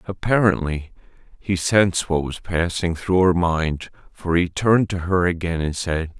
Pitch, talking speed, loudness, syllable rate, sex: 90 Hz, 165 wpm, -21 LUFS, 4.5 syllables/s, male